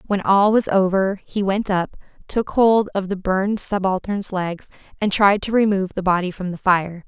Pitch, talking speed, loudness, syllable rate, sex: 195 Hz, 195 wpm, -19 LUFS, 4.9 syllables/s, female